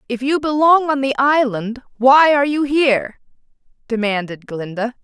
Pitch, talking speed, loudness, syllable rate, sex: 255 Hz, 145 wpm, -16 LUFS, 4.8 syllables/s, female